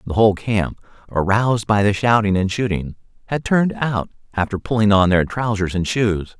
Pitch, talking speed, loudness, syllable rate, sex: 105 Hz, 180 wpm, -19 LUFS, 5.2 syllables/s, male